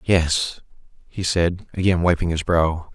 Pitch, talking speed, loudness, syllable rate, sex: 85 Hz, 145 wpm, -21 LUFS, 3.9 syllables/s, male